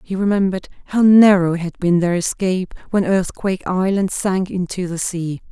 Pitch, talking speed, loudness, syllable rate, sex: 185 Hz, 165 wpm, -18 LUFS, 5.2 syllables/s, female